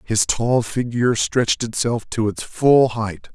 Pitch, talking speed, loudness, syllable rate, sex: 115 Hz, 160 wpm, -19 LUFS, 4.0 syllables/s, male